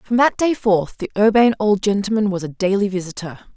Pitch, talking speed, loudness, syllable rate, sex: 200 Hz, 200 wpm, -18 LUFS, 5.8 syllables/s, female